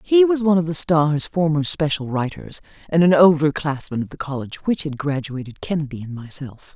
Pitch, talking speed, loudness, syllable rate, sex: 155 Hz, 195 wpm, -20 LUFS, 5.5 syllables/s, female